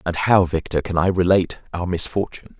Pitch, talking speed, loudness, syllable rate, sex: 90 Hz, 185 wpm, -20 LUFS, 5.9 syllables/s, male